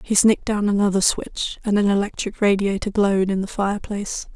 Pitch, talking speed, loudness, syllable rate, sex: 200 Hz, 180 wpm, -21 LUFS, 5.8 syllables/s, female